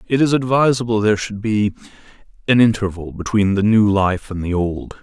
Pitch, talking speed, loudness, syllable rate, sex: 105 Hz, 180 wpm, -17 LUFS, 5.3 syllables/s, male